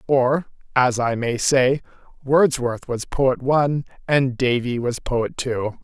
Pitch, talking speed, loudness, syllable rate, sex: 130 Hz, 145 wpm, -21 LUFS, 3.6 syllables/s, male